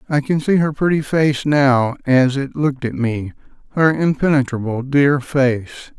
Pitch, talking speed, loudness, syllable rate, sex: 135 Hz, 150 wpm, -17 LUFS, 4.5 syllables/s, male